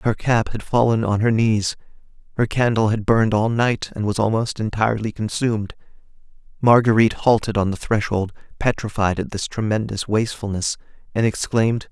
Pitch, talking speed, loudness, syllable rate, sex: 110 Hz, 150 wpm, -20 LUFS, 5.4 syllables/s, male